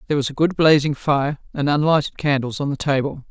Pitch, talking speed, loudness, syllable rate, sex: 145 Hz, 220 wpm, -19 LUFS, 6.0 syllables/s, female